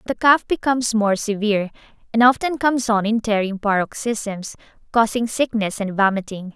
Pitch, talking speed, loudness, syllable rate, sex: 220 Hz, 145 wpm, -19 LUFS, 5.2 syllables/s, female